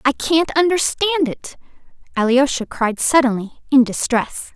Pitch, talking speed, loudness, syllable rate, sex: 275 Hz, 120 wpm, -17 LUFS, 4.4 syllables/s, female